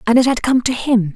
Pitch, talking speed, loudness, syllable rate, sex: 240 Hz, 315 wpm, -16 LUFS, 5.9 syllables/s, female